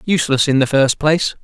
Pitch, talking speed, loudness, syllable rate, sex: 140 Hz, 210 wpm, -15 LUFS, 6.2 syllables/s, male